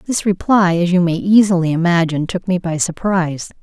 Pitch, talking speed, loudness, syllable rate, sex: 180 Hz, 180 wpm, -16 LUFS, 5.4 syllables/s, female